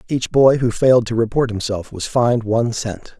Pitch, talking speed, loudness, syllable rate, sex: 115 Hz, 205 wpm, -17 LUFS, 5.4 syllables/s, male